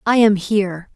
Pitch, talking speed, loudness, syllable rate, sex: 200 Hz, 190 wpm, -17 LUFS, 5.0 syllables/s, female